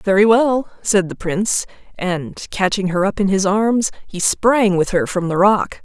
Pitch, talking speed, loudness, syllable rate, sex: 195 Hz, 195 wpm, -17 LUFS, 4.2 syllables/s, female